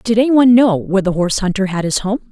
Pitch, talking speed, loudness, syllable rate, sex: 210 Hz, 285 wpm, -14 LUFS, 7.5 syllables/s, female